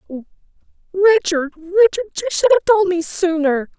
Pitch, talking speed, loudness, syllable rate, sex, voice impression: 365 Hz, 145 wpm, -16 LUFS, 5.5 syllables/s, female, feminine, adult-like, slightly soft, slightly intellectual, slightly calm